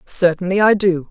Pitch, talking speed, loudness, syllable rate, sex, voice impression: 185 Hz, 165 wpm, -16 LUFS, 5.1 syllables/s, female, feminine, adult-like, slightly fluent, intellectual, slightly elegant